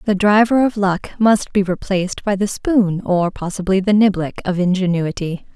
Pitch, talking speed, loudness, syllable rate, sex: 195 Hz, 150 wpm, -17 LUFS, 4.9 syllables/s, female